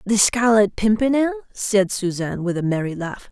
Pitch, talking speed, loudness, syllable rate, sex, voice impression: 210 Hz, 165 wpm, -20 LUFS, 4.9 syllables/s, female, feminine, adult-like, slightly dark, clear, fluent, intellectual, elegant, lively, slightly strict, slightly sharp